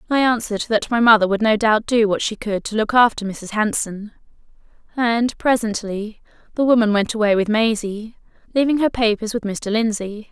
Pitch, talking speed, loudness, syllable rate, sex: 220 Hz, 180 wpm, -19 LUFS, 5.1 syllables/s, female